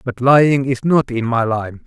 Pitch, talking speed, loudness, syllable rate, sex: 125 Hz, 225 wpm, -16 LUFS, 4.6 syllables/s, male